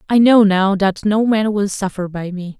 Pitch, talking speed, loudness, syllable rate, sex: 200 Hz, 230 wpm, -15 LUFS, 4.6 syllables/s, female